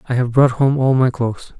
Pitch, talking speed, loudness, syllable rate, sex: 125 Hz, 265 wpm, -16 LUFS, 5.8 syllables/s, male